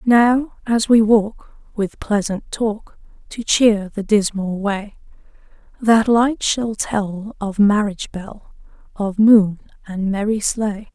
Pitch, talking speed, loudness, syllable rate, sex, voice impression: 210 Hz, 130 wpm, -18 LUFS, 3.3 syllables/s, female, very feminine, young, very thin, relaxed, weak, dark, very soft, muffled, fluent, raspy, very cute, very intellectual, slightly refreshing, sincere, very calm, friendly, slightly reassuring, very unique, very elegant, very sweet, very kind, very modest, light